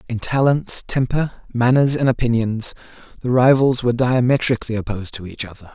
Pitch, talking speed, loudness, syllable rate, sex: 120 Hz, 145 wpm, -19 LUFS, 5.6 syllables/s, male